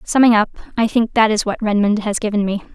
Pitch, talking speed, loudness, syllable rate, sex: 215 Hz, 240 wpm, -17 LUFS, 6.0 syllables/s, female